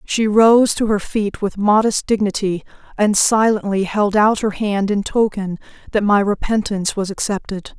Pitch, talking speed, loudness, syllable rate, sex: 205 Hz, 160 wpm, -17 LUFS, 4.6 syllables/s, female